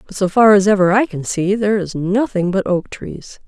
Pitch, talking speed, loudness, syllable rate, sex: 195 Hz, 240 wpm, -15 LUFS, 5.1 syllables/s, female